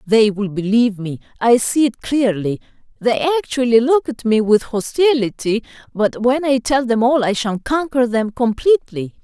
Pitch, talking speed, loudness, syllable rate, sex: 235 Hz, 170 wpm, -17 LUFS, 4.7 syllables/s, female